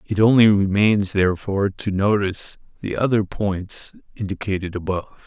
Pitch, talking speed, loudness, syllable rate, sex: 100 Hz, 125 wpm, -20 LUFS, 5.1 syllables/s, male